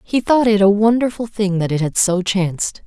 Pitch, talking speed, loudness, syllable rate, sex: 205 Hz, 230 wpm, -16 LUFS, 5.1 syllables/s, female